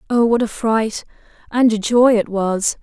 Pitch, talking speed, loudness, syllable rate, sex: 225 Hz, 190 wpm, -17 LUFS, 4.2 syllables/s, female